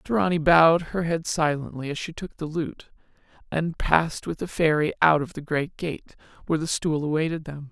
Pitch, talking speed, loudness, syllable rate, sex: 160 Hz, 195 wpm, -24 LUFS, 5.4 syllables/s, female